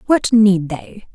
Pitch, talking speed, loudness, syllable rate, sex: 205 Hz, 155 wpm, -14 LUFS, 3.2 syllables/s, female